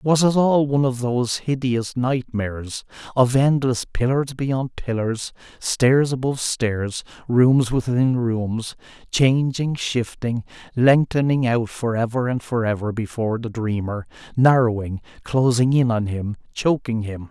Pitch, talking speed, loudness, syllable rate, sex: 120 Hz, 130 wpm, -21 LUFS, 4.1 syllables/s, male